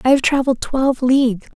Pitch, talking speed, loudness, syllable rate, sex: 260 Hz, 195 wpm, -17 LUFS, 6.5 syllables/s, female